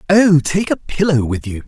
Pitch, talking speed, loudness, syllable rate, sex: 150 Hz, 215 wpm, -16 LUFS, 4.8 syllables/s, male